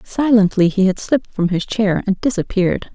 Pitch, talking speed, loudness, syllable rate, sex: 205 Hz, 185 wpm, -17 LUFS, 5.3 syllables/s, female